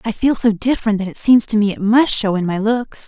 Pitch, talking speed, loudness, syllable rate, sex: 220 Hz, 295 wpm, -16 LUFS, 5.7 syllables/s, female